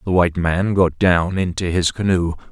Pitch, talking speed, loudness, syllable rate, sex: 90 Hz, 190 wpm, -18 LUFS, 4.9 syllables/s, male